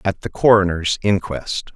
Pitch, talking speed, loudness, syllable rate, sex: 95 Hz, 135 wpm, -18 LUFS, 4.4 syllables/s, male